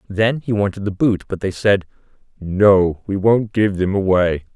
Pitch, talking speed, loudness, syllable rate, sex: 100 Hz, 185 wpm, -17 LUFS, 4.3 syllables/s, male